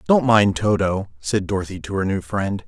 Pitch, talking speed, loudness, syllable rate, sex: 100 Hz, 200 wpm, -20 LUFS, 5.0 syllables/s, male